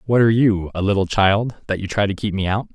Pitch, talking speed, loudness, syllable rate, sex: 100 Hz, 285 wpm, -19 LUFS, 6.1 syllables/s, male